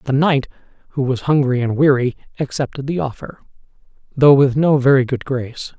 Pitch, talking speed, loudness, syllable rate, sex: 135 Hz, 165 wpm, -17 LUFS, 5.4 syllables/s, male